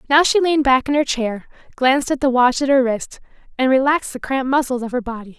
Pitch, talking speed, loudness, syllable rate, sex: 265 Hz, 245 wpm, -18 LUFS, 6.4 syllables/s, female